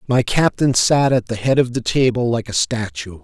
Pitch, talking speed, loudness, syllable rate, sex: 120 Hz, 220 wpm, -17 LUFS, 4.9 syllables/s, male